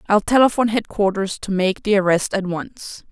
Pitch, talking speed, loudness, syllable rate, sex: 200 Hz, 175 wpm, -19 LUFS, 5.2 syllables/s, female